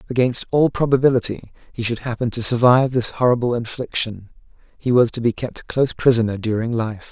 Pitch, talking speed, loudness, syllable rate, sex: 120 Hz, 175 wpm, -19 LUFS, 5.9 syllables/s, male